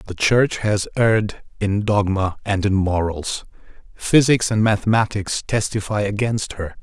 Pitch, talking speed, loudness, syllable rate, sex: 105 Hz, 130 wpm, -20 LUFS, 4.3 syllables/s, male